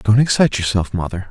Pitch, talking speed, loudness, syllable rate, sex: 105 Hz, 185 wpm, -17 LUFS, 6.3 syllables/s, male